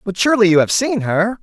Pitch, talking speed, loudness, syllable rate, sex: 200 Hz, 255 wpm, -15 LUFS, 6.1 syllables/s, male